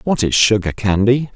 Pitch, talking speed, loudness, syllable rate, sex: 110 Hz, 175 wpm, -15 LUFS, 4.9 syllables/s, male